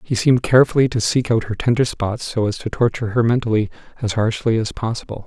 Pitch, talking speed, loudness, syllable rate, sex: 115 Hz, 215 wpm, -19 LUFS, 6.4 syllables/s, male